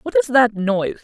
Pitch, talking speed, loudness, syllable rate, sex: 220 Hz, 230 wpm, -17 LUFS, 5.4 syllables/s, female